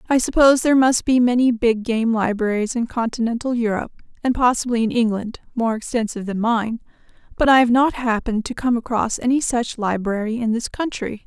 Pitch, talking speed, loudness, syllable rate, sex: 235 Hz, 180 wpm, -19 LUFS, 5.8 syllables/s, female